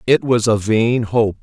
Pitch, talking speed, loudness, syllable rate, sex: 115 Hz, 210 wpm, -16 LUFS, 4.0 syllables/s, male